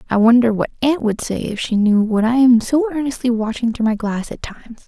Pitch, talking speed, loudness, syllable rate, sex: 235 Hz, 245 wpm, -17 LUFS, 5.5 syllables/s, female